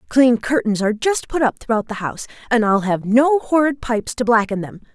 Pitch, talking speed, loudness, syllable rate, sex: 240 Hz, 220 wpm, -18 LUFS, 5.7 syllables/s, female